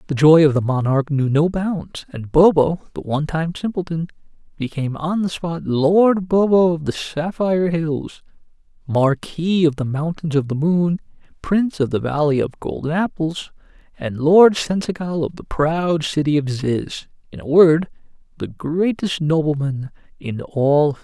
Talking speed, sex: 155 wpm, male